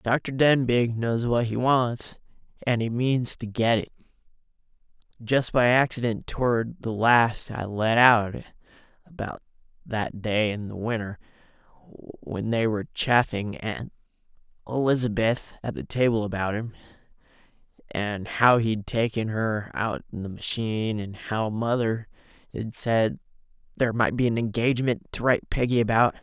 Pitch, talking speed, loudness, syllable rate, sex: 115 Hz, 140 wpm, -25 LUFS, 4.4 syllables/s, male